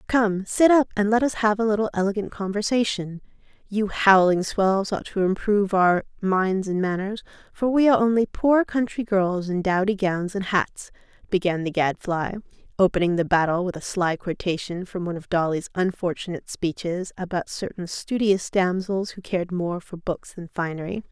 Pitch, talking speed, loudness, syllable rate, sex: 190 Hz, 175 wpm, -23 LUFS, 5.0 syllables/s, female